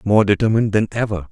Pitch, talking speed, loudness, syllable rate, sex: 105 Hz, 185 wpm, -17 LUFS, 6.8 syllables/s, male